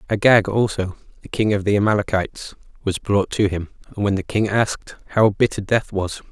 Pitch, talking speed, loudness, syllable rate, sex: 100 Hz, 190 wpm, -20 LUFS, 5.4 syllables/s, male